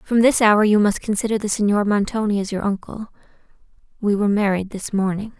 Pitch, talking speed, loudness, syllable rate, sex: 205 Hz, 180 wpm, -19 LUFS, 5.8 syllables/s, female